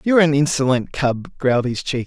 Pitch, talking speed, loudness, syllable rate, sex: 140 Hz, 235 wpm, -19 LUFS, 6.1 syllables/s, male